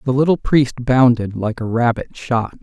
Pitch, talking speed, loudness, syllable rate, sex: 125 Hz, 185 wpm, -17 LUFS, 4.4 syllables/s, male